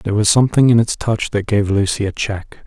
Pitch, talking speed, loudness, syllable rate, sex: 105 Hz, 245 wpm, -16 LUFS, 5.7 syllables/s, male